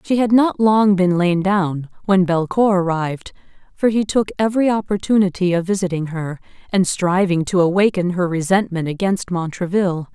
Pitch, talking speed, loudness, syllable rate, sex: 185 Hz, 155 wpm, -18 LUFS, 5.1 syllables/s, female